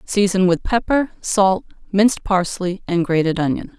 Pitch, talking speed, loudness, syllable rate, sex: 190 Hz, 145 wpm, -18 LUFS, 4.6 syllables/s, female